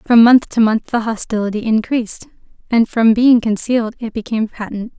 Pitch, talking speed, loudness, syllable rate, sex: 225 Hz, 170 wpm, -15 LUFS, 5.4 syllables/s, female